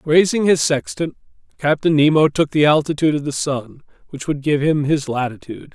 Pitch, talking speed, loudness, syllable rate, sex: 150 Hz, 180 wpm, -18 LUFS, 5.5 syllables/s, male